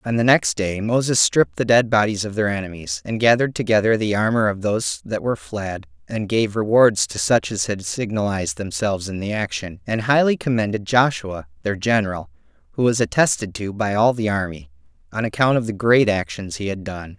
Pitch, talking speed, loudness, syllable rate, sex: 105 Hz, 200 wpm, -20 LUFS, 5.5 syllables/s, male